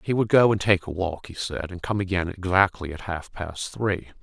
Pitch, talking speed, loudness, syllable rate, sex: 95 Hz, 240 wpm, -24 LUFS, 5.2 syllables/s, male